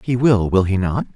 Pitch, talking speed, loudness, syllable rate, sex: 105 Hz, 260 wpm, -17 LUFS, 5.1 syllables/s, male